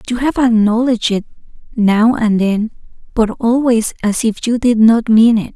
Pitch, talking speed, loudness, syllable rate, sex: 230 Hz, 175 wpm, -14 LUFS, 4.6 syllables/s, female